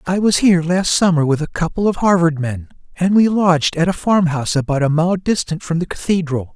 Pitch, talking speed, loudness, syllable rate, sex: 170 Hz, 220 wpm, -16 LUFS, 5.7 syllables/s, male